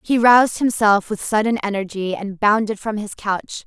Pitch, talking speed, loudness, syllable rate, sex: 210 Hz, 180 wpm, -18 LUFS, 4.9 syllables/s, female